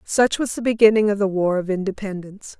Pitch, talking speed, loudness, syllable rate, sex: 200 Hz, 210 wpm, -20 LUFS, 6.0 syllables/s, female